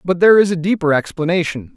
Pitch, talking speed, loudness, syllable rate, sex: 170 Hz, 205 wpm, -15 LUFS, 6.7 syllables/s, male